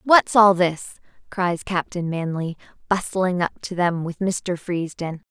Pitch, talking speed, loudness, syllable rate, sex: 180 Hz, 145 wpm, -22 LUFS, 3.9 syllables/s, female